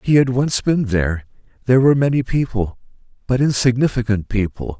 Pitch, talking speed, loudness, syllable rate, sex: 120 Hz, 150 wpm, -18 LUFS, 5.8 syllables/s, male